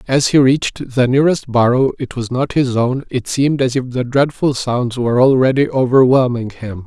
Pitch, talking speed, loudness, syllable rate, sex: 130 Hz, 175 wpm, -15 LUFS, 5.2 syllables/s, male